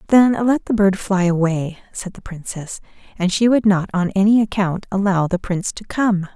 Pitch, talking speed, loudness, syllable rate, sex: 195 Hz, 200 wpm, -18 LUFS, 4.9 syllables/s, female